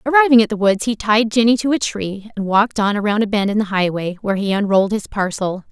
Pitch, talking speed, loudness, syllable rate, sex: 210 Hz, 250 wpm, -17 LUFS, 6.2 syllables/s, female